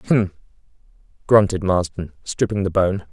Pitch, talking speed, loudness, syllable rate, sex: 95 Hz, 115 wpm, -20 LUFS, 4.4 syllables/s, male